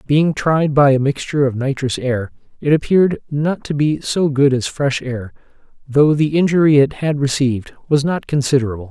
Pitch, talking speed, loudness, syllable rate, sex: 140 Hz, 180 wpm, -16 LUFS, 5.2 syllables/s, male